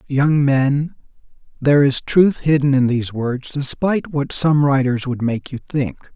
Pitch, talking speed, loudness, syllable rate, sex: 140 Hz, 165 wpm, -18 LUFS, 4.4 syllables/s, male